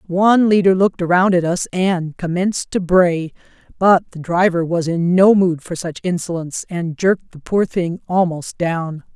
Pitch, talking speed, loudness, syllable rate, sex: 180 Hz, 175 wpm, -17 LUFS, 4.7 syllables/s, female